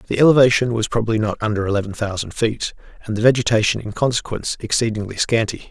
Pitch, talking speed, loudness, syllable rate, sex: 110 Hz, 170 wpm, -19 LUFS, 6.6 syllables/s, male